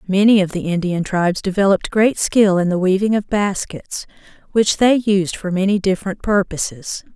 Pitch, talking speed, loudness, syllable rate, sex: 195 Hz, 170 wpm, -17 LUFS, 5.1 syllables/s, female